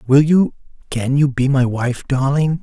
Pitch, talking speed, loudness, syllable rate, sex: 135 Hz, 160 wpm, -17 LUFS, 4.3 syllables/s, male